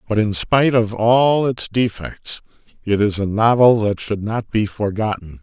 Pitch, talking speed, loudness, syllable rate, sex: 110 Hz, 175 wpm, -18 LUFS, 4.4 syllables/s, male